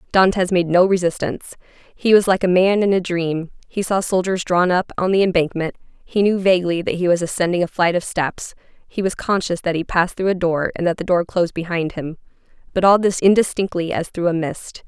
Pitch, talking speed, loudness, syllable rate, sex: 180 Hz, 220 wpm, -19 LUFS, 5.7 syllables/s, female